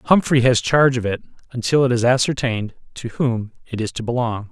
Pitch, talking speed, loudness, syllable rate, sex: 120 Hz, 200 wpm, -19 LUFS, 5.7 syllables/s, male